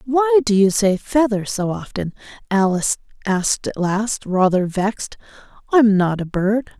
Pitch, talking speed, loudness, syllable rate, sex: 210 Hz, 150 wpm, -18 LUFS, 4.4 syllables/s, female